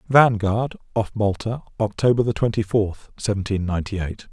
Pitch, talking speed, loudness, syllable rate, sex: 105 Hz, 125 wpm, -22 LUFS, 4.9 syllables/s, male